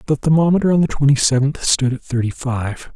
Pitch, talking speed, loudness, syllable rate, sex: 140 Hz, 205 wpm, -17 LUFS, 5.8 syllables/s, male